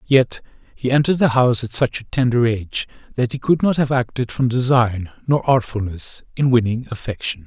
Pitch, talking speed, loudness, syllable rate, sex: 120 Hz, 185 wpm, -19 LUFS, 5.4 syllables/s, male